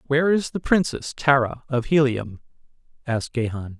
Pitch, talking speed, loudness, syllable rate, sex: 135 Hz, 140 wpm, -22 LUFS, 5.1 syllables/s, male